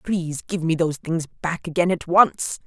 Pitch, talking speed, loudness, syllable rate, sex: 165 Hz, 205 wpm, -22 LUFS, 4.9 syllables/s, female